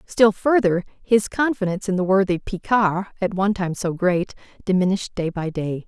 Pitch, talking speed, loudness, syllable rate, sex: 190 Hz, 175 wpm, -21 LUFS, 5.2 syllables/s, female